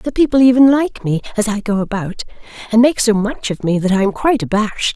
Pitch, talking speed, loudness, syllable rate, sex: 220 Hz, 240 wpm, -15 LUFS, 6.1 syllables/s, female